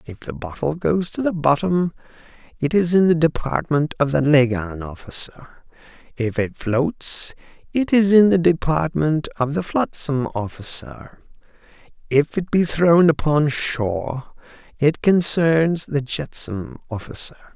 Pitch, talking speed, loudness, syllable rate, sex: 145 Hz, 135 wpm, -20 LUFS, 4.1 syllables/s, male